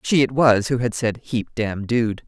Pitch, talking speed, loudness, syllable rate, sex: 115 Hz, 235 wpm, -20 LUFS, 4.3 syllables/s, female